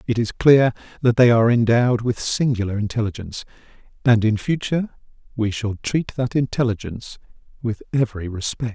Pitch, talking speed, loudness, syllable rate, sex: 115 Hz, 145 wpm, -20 LUFS, 5.8 syllables/s, male